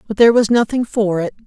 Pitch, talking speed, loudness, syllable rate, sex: 215 Hz, 245 wpm, -15 LUFS, 6.6 syllables/s, female